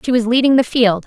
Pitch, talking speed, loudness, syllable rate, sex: 240 Hz, 280 wpm, -14 LUFS, 6.3 syllables/s, female